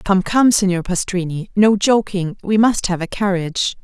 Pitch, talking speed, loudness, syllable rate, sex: 195 Hz, 170 wpm, -17 LUFS, 4.7 syllables/s, female